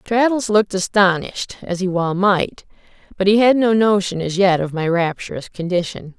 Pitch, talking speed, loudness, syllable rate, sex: 190 Hz, 175 wpm, -18 LUFS, 5.1 syllables/s, female